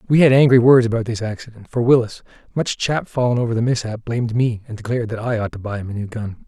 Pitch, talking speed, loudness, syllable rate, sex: 115 Hz, 250 wpm, -19 LUFS, 6.6 syllables/s, male